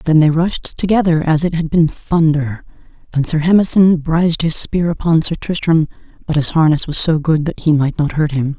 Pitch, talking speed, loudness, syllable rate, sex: 160 Hz, 210 wpm, -15 LUFS, 5.1 syllables/s, female